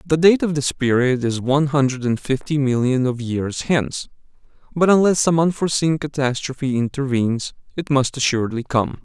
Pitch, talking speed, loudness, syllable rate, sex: 140 Hz, 160 wpm, -19 LUFS, 5.4 syllables/s, male